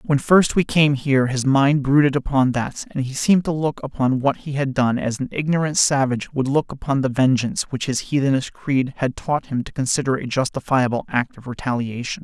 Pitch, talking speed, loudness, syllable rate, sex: 135 Hz, 210 wpm, -20 LUFS, 5.5 syllables/s, male